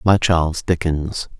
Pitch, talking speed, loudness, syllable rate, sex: 85 Hz, 130 wpm, -19 LUFS, 4.1 syllables/s, male